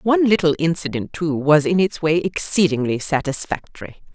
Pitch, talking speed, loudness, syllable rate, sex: 160 Hz, 145 wpm, -19 LUFS, 5.2 syllables/s, female